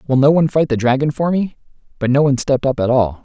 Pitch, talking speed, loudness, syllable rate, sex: 135 Hz, 280 wpm, -16 LUFS, 7.2 syllables/s, male